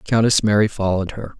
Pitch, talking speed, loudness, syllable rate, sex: 105 Hz, 170 wpm, -18 LUFS, 6.4 syllables/s, male